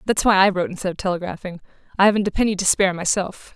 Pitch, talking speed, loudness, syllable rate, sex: 190 Hz, 235 wpm, -19 LUFS, 7.5 syllables/s, female